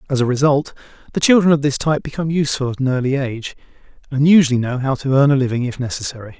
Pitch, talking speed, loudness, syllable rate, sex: 135 Hz, 225 wpm, -17 LUFS, 7.5 syllables/s, male